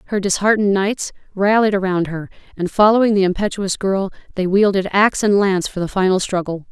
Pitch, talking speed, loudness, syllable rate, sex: 195 Hz, 180 wpm, -17 LUFS, 5.9 syllables/s, female